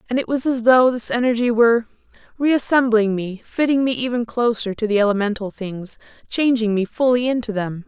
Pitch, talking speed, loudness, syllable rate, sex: 230 Hz, 170 wpm, -19 LUFS, 5.4 syllables/s, female